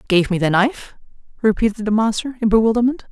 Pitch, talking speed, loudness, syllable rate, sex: 220 Hz, 175 wpm, -18 LUFS, 6.7 syllables/s, female